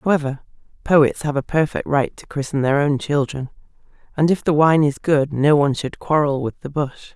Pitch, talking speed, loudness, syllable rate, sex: 145 Hz, 200 wpm, -19 LUFS, 5.1 syllables/s, female